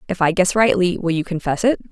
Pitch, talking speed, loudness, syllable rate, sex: 185 Hz, 250 wpm, -18 LUFS, 6.3 syllables/s, female